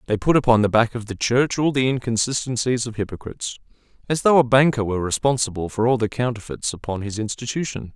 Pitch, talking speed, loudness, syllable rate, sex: 120 Hz, 190 wpm, -21 LUFS, 6.2 syllables/s, male